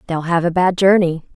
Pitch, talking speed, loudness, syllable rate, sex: 175 Hz, 220 wpm, -16 LUFS, 5.3 syllables/s, female